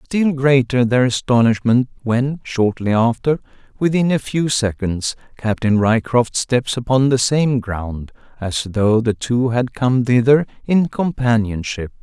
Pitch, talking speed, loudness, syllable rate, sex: 120 Hz, 130 wpm, -17 LUFS, 4.0 syllables/s, male